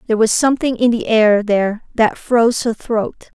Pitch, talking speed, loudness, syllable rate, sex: 225 Hz, 195 wpm, -16 LUFS, 5.2 syllables/s, female